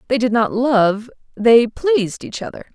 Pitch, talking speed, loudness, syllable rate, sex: 235 Hz, 175 wpm, -16 LUFS, 4.5 syllables/s, female